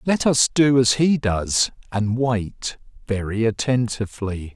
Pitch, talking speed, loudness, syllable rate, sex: 115 Hz, 130 wpm, -21 LUFS, 3.8 syllables/s, male